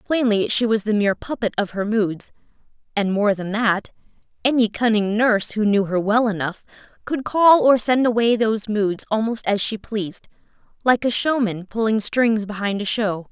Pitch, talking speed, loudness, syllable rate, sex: 215 Hz, 180 wpm, -20 LUFS, 4.9 syllables/s, female